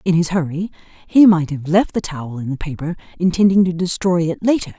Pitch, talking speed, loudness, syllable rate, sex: 170 Hz, 215 wpm, -17 LUFS, 5.9 syllables/s, female